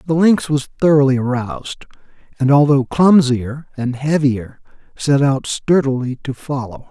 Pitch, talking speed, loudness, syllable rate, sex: 140 Hz, 130 wpm, -16 LUFS, 4.4 syllables/s, male